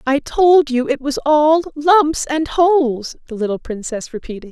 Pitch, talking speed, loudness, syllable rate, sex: 280 Hz, 175 wpm, -16 LUFS, 4.3 syllables/s, female